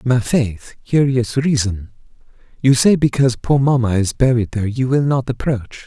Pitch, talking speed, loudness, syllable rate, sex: 125 Hz, 165 wpm, -17 LUFS, 4.8 syllables/s, male